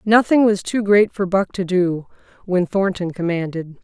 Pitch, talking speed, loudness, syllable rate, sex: 190 Hz, 170 wpm, -18 LUFS, 4.5 syllables/s, female